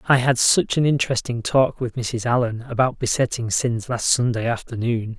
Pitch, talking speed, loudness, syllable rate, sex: 120 Hz, 175 wpm, -21 LUFS, 5.0 syllables/s, male